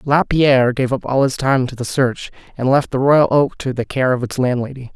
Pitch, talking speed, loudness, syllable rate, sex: 130 Hz, 240 wpm, -17 LUFS, 5.2 syllables/s, male